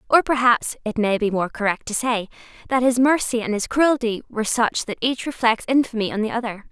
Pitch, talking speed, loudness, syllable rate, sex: 235 Hz, 215 wpm, -21 LUFS, 5.6 syllables/s, female